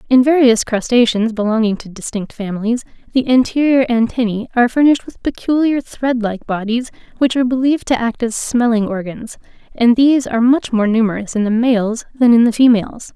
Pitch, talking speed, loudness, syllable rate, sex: 235 Hz, 175 wpm, -15 LUFS, 5.6 syllables/s, female